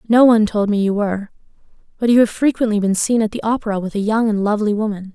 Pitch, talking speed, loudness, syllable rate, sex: 215 Hz, 245 wpm, -17 LUFS, 6.9 syllables/s, female